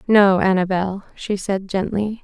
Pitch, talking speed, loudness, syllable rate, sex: 195 Hz, 135 wpm, -19 LUFS, 4.1 syllables/s, female